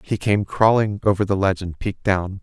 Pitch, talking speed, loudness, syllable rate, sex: 100 Hz, 225 wpm, -20 LUFS, 5.7 syllables/s, male